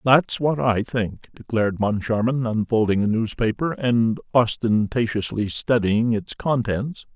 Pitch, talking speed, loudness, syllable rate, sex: 115 Hz, 115 wpm, -22 LUFS, 4.1 syllables/s, male